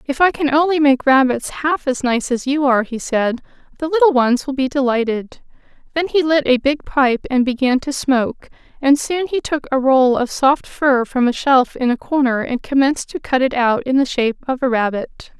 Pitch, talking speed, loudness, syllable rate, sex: 265 Hz, 220 wpm, -17 LUFS, 5.1 syllables/s, female